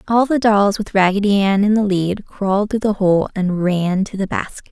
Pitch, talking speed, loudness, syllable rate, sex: 200 Hz, 230 wpm, -17 LUFS, 5.0 syllables/s, female